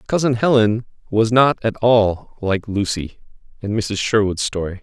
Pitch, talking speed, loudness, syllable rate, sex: 110 Hz, 150 wpm, -18 LUFS, 4.4 syllables/s, male